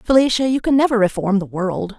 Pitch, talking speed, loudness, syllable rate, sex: 220 Hz, 210 wpm, -17 LUFS, 5.8 syllables/s, female